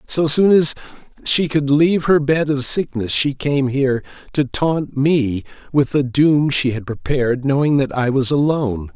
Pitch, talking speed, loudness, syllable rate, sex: 140 Hz, 180 wpm, -17 LUFS, 4.5 syllables/s, male